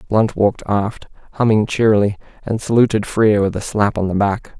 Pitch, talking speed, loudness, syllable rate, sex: 105 Hz, 185 wpm, -17 LUFS, 5.5 syllables/s, male